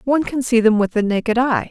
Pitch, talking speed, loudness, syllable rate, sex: 235 Hz, 280 wpm, -17 LUFS, 6.2 syllables/s, female